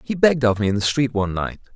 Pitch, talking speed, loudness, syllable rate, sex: 115 Hz, 310 wpm, -20 LUFS, 7.2 syllables/s, male